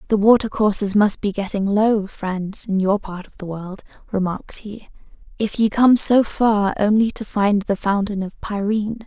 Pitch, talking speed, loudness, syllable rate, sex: 205 Hz, 180 wpm, -19 LUFS, 4.7 syllables/s, female